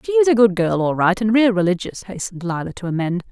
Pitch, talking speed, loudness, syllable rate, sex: 200 Hz, 255 wpm, -18 LUFS, 6.6 syllables/s, female